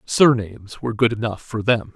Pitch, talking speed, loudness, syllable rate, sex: 115 Hz, 185 wpm, -20 LUFS, 6.0 syllables/s, male